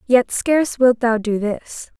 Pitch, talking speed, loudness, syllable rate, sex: 240 Hz, 180 wpm, -18 LUFS, 3.9 syllables/s, female